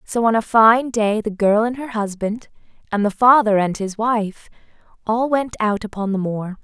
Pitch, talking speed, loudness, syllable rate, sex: 220 Hz, 200 wpm, -18 LUFS, 4.5 syllables/s, female